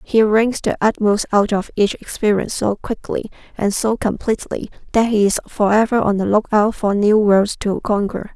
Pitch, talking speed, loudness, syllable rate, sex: 210 Hz, 180 wpm, -17 LUFS, 5.0 syllables/s, female